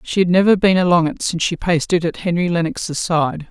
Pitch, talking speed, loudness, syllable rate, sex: 170 Hz, 240 wpm, -17 LUFS, 5.9 syllables/s, female